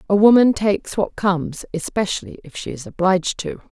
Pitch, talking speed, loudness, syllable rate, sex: 185 Hz, 160 wpm, -19 LUFS, 5.7 syllables/s, female